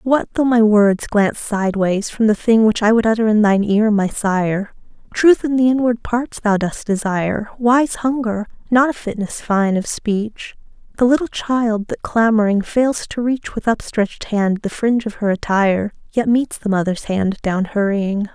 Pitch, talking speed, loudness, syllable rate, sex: 215 Hz, 185 wpm, -17 LUFS, 4.6 syllables/s, female